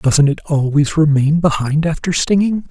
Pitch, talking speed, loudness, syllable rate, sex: 155 Hz, 155 wpm, -15 LUFS, 4.5 syllables/s, male